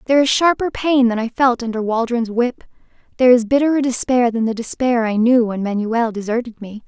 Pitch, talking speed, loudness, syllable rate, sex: 240 Hz, 200 wpm, -17 LUFS, 5.7 syllables/s, female